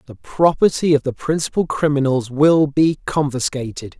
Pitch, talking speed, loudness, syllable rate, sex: 145 Hz, 135 wpm, -18 LUFS, 4.7 syllables/s, male